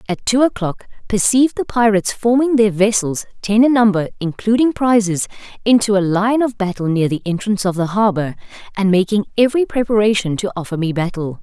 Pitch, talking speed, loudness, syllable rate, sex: 210 Hz, 175 wpm, -16 LUFS, 5.8 syllables/s, female